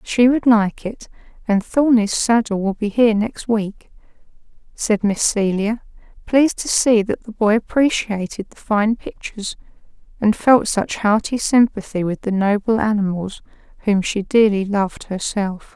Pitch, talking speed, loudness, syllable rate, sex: 215 Hz, 150 wpm, -18 LUFS, 4.5 syllables/s, female